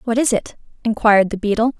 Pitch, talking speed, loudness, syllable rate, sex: 220 Hz, 200 wpm, -17 LUFS, 6.4 syllables/s, female